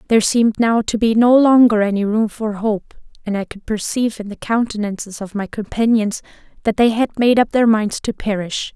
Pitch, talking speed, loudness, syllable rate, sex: 220 Hz, 205 wpm, -17 LUFS, 5.4 syllables/s, female